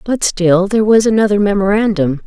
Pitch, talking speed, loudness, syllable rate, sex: 200 Hz, 160 wpm, -13 LUFS, 5.6 syllables/s, female